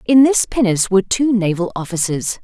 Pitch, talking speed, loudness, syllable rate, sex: 205 Hz, 175 wpm, -16 LUFS, 5.7 syllables/s, female